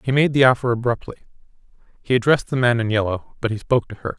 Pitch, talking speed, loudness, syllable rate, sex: 120 Hz, 230 wpm, -20 LUFS, 7.2 syllables/s, male